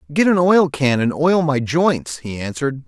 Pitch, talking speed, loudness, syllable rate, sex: 145 Hz, 210 wpm, -17 LUFS, 4.6 syllables/s, male